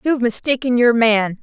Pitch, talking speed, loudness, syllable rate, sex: 235 Hz, 170 wpm, -16 LUFS, 5.3 syllables/s, female